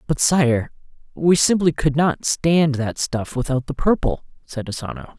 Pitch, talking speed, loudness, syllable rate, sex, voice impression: 145 Hz, 160 wpm, -20 LUFS, 4.4 syllables/s, male, slightly masculine, slightly adult-like, slightly clear, refreshing, slightly sincere, slightly friendly